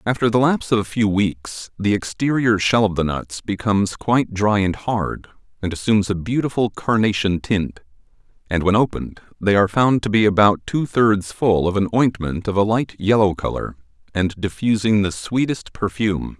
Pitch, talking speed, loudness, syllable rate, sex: 105 Hz, 180 wpm, -19 LUFS, 5.1 syllables/s, male